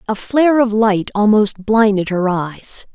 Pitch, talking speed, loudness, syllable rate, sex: 210 Hz, 165 wpm, -15 LUFS, 4.1 syllables/s, female